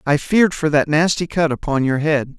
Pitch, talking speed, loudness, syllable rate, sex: 150 Hz, 225 wpm, -17 LUFS, 5.3 syllables/s, male